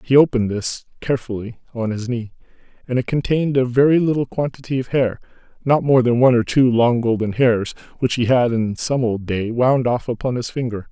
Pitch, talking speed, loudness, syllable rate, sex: 120 Hz, 205 wpm, -19 LUFS, 5.7 syllables/s, male